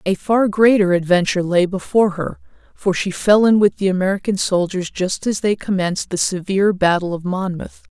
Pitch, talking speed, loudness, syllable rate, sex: 190 Hz, 180 wpm, -17 LUFS, 5.4 syllables/s, female